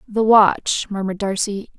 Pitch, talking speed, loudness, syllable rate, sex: 205 Hz, 135 wpm, -18 LUFS, 4.5 syllables/s, female